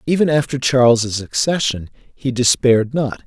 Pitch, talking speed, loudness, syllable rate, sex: 130 Hz, 130 wpm, -16 LUFS, 4.6 syllables/s, male